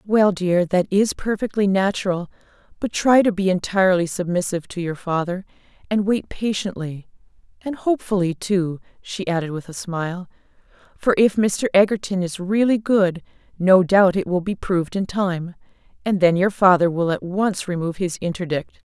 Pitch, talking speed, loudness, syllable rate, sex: 190 Hz, 160 wpm, -20 LUFS, 5.1 syllables/s, female